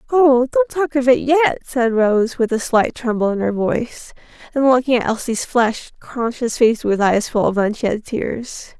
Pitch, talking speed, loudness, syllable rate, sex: 245 Hz, 190 wpm, -17 LUFS, 4.8 syllables/s, female